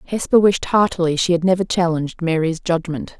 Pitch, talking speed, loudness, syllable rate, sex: 175 Hz, 170 wpm, -18 LUFS, 5.6 syllables/s, female